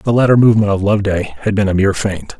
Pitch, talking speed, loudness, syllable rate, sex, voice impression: 100 Hz, 250 wpm, -14 LUFS, 6.8 syllables/s, male, very masculine, middle-aged, thick, cool, wild